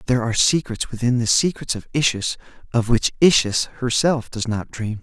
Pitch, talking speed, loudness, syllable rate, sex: 120 Hz, 180 wpm, -20 LUFS, 5.4 syllables/s, male